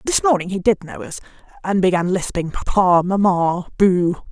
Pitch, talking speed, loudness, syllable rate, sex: 185 Hz, 165 wpm, -18 LUFS, 4.8 syllables/s, female